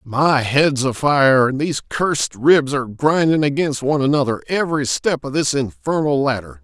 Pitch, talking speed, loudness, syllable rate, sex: 135 Hz, 170 wpm, -17 LUFS, 5.0 syllables/s, male